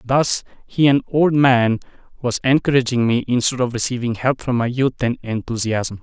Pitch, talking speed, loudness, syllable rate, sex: 125 Hz, 170 wpm, -18 LUFS, 4.9 syllables/s, male